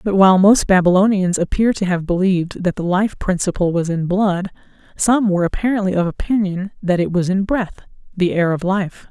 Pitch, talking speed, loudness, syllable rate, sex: 190 Hz, 185 wpm, -17 LUFS, 5.4 syllables/s, female